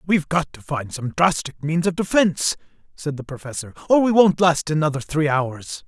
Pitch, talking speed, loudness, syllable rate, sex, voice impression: 160 Hz, 195 wpm, -21 LUFS, 5.3 syllables/s, male, very masculine, middle-aged, thick, tensed, slightly powerful, bright, slightly soft, clear, fluent, slightly raspy, cool, intellectual, very refreshing, sincere, slightly calm, mature, very friendly, very reassuring, unique, slightly elegant, wild, slightly sweet, very lively, kind, intense